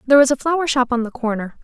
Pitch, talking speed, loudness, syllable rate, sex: 255 Hz, 295 wpm, -18 LUFS, 7.4 syllables/s, female